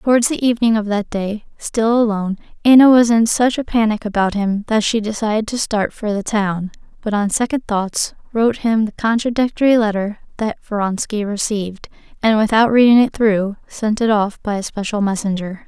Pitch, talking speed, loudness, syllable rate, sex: 215 Hz, 185 wpm, -17 LUFS, 5.2 syllables/s, female